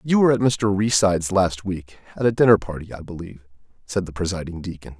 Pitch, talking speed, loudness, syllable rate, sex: 95 Hz, 205 wpm, -21 LUFS, 6.2 syllables/s, male